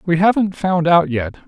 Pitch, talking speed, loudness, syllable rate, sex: 170 Hz, 205 wpm, -16 LUFS, 4.8 syllables/s, male